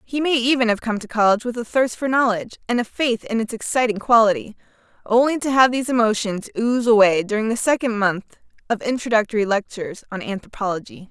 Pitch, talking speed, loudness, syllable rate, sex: 230 Hz, 190 wpm, -20 LUFS, 6.3 syllables/s, female